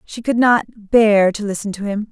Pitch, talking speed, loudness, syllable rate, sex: 215 Hz, 225 wpm, -16 LUFS, 4.8 syllables/s, female